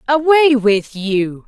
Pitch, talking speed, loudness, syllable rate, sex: 245 Hz, 120 wpm, -14 LUFS, 3.1 syllables/s, female